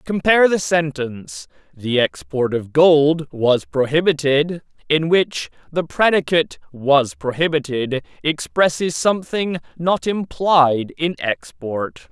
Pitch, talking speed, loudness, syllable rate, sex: 150 Hz, 105 wpm, -18 LUFS, 3.9 syllables/s, male